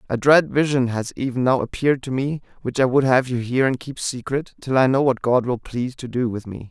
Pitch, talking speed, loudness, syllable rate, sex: 130 Hz, 260 wpm, -21 LUFS, 5.6 syllables/s, male